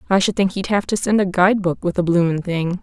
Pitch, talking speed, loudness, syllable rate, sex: 185 Hz, 275 wpm, -18 LUFS, 6.1 syllables/s, female